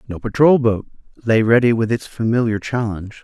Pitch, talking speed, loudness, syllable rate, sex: 115 Hz, 165 wpm, -17 LUFS, 5.6 syllables/s, male